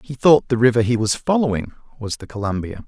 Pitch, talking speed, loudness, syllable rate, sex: 120 Hz, 210 wpm, -19 LUFS, 6.0 syllables/s, male